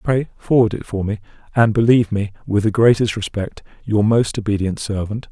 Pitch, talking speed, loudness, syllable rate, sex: 110 Hz, 180 wpm, -18 LUFS, 5.5 syllables/s, male